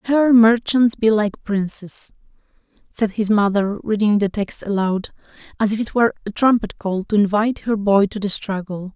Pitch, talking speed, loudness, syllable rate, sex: 210 Hz, 175 wpm, -19 LUFS, 4.9 syllables/s, female